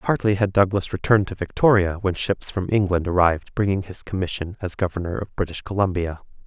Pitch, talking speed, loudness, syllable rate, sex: 95 Hz, 175 wpm, -22 LUFS, 5.9 syllables/s, male